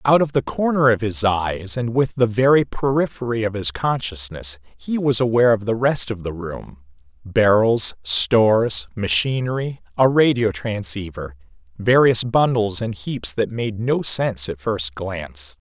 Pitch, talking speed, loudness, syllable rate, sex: 110 Hz, 155 wpm, -19 LUFS, 4.3 syllables/s, male